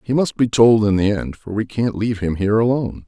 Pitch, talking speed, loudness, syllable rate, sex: 110 Hz, 275 wpm, -18 LUFS, 6.1 syllables/s, male